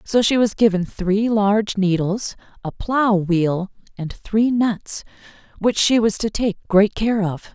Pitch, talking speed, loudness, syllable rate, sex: 205 Hz, 165 wpm, -19 LUFS, 3.8 syllables/s, female